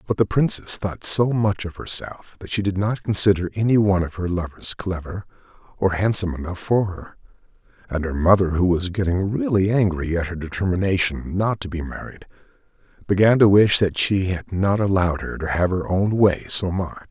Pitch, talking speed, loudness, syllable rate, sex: 95 Hz, 195 wpm, -21 LUFS, 5.3 syllables/s, male